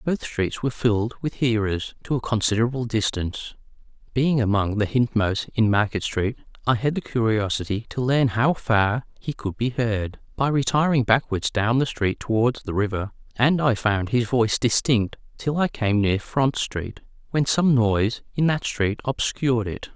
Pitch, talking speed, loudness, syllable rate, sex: 115 Hz, 175 wpm, -23 LUFS, 4.8 syllables/s, male